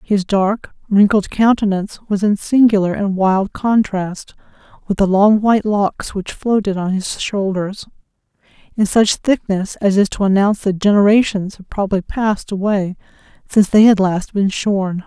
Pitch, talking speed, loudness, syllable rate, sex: 200 Hz, 150 wpm, -16 LUFS, 4.6 syllables/s, female